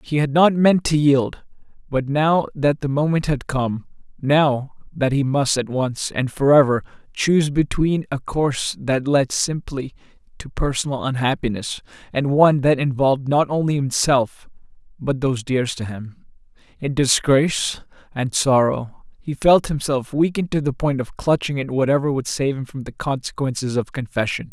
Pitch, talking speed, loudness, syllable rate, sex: 140 Hz, 160 wpm, -20 LUFS, 4.8 syllables/s, male